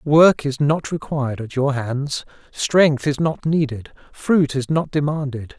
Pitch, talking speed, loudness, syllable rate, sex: 140 Hz, 160 wpm, -20 LUFS, 3.9 syllables/s, male